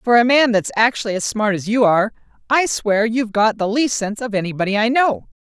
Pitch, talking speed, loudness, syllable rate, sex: 225 Hz, 230 wpm, -17 LUFS, 6.0 syllables/s, female